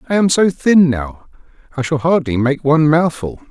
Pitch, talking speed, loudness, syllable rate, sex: 150 Hz, 190 wpm, -14 LUFS, 4.9 syllables/s, male